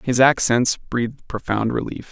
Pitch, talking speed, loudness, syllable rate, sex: 120 Hz, 140 wpm, -20 LUFS, 4.5 syllables/s, male